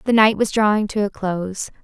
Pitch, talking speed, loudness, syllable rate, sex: 205 Hz, 230 wpm, -19 LUFS, 5.6 syllables/s, female